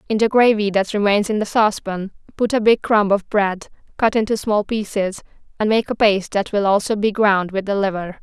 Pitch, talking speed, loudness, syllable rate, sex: 205 Hz, 220 wpm, -18 LUFS, 5.5 syllables/s, female